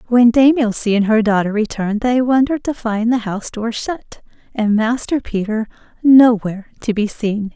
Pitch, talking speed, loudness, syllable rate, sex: 230 Hz, 175 wpm, -16 LUFS, 5.0 syllables/s, female